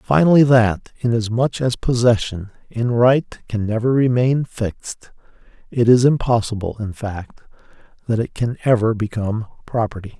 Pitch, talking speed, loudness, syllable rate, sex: 115 Hz, 130 wpm, -18 LUFS, 4.7 syllables/s, male